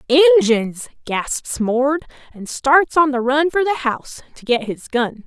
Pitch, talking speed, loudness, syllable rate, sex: 270 Hz, 160 wpm, -17 LUFS, 3.7 syllables/s, female